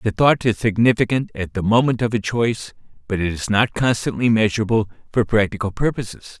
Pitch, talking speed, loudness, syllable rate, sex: 110 Hz, 180 wpm, -19 LUFS, 5.8 syllables/s, male